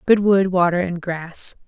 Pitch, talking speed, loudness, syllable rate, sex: 180 Hz, 180 wpm, -19 LUFS, 4.1 syllables/s, female